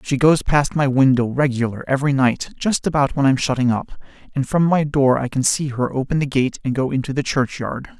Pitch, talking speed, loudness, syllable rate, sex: 135 Hz, 225 wpm, -19 LUFS, 5.5 syllables/s, male